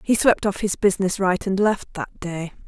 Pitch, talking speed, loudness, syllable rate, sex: 195 Hz, 225 wpm, -22 LUFS, 5.1 syllables/s, female